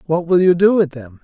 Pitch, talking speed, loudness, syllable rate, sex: 165 Hz, 290 wpm, -15 LUFS, 5.6 syllables/s, male